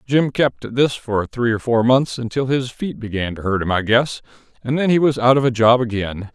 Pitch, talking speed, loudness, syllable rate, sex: 120 Hz, 255 wpm, -18 LUFS, 5.2 syllables/s, male